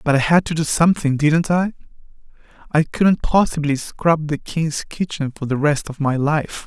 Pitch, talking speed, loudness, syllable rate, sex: 155 Hz, 180 wpm, -19 LUFS, 4.8 syllables/s, male